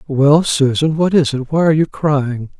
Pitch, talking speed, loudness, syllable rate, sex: 145 Hz, 160 wpm, -15 LUFS, 4.6 syllables/s, male